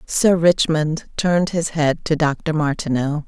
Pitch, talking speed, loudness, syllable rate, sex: 155 Hz, 145 wpm, -19 LUFS, 3.9 syllables/s, female